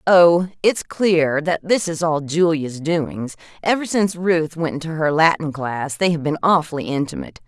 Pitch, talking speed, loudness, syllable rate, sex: 160 Hz, 175 wpm, -19 LUFS, 4.7 syllables/s, female